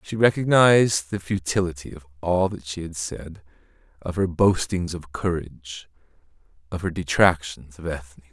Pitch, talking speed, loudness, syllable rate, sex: 85 Hz, 145 wpm, -23 LUFS, 4.8 syllables/s, male